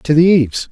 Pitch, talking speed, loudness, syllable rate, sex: 160 Hz, 255 wpm, -12 LUFS, 6.0 syllables/s, male